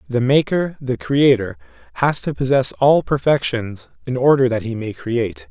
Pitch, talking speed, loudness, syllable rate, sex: 130 Hz, 165 wpm, -18 LUFS, 4.7 syllables/s, male